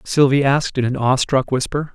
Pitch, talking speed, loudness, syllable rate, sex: 135 Hz, 185 wpm, -18 LUFS, 6.0 syllables/s, male